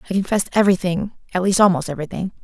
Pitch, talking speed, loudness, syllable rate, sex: 185 Hz, 150 wpm, -19 LUFS, 8.5 syllables/s, female